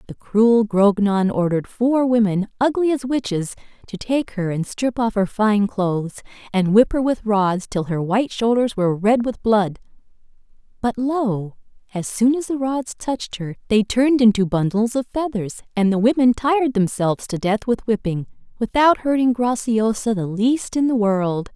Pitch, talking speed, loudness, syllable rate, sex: 220 Hz, 175 wpm, -19 LUFS, 4.7 syllables/s, female